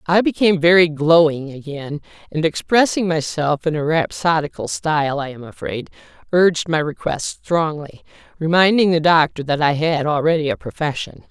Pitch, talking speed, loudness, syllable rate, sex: 160 Hz, 150 wpm, -18 LUFS, 5.1 syllables/s, female